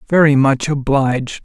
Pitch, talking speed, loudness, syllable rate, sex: 140 Hz, 125 wpm, -15 LUFS, 4.9 syllables/s, male